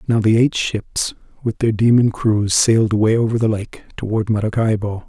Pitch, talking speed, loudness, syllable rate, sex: 110 Hz, 175 wpm, -17 LUFS, 5.1 syllables/s, male